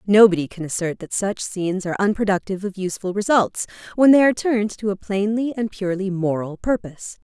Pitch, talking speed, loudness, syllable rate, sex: 200 Hz, 180 wpm, -21 LUFS, 6.3 syllables/s, female